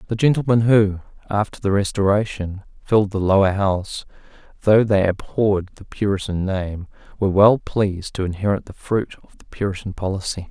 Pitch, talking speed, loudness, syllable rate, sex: 100 Hz, 155 wpm, -20 LUFS, 5.5 syllables/s, male